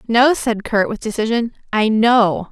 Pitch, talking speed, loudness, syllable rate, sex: 225 Hz, 165 wpm, -17 LUFS, 4.2 syllables/s, female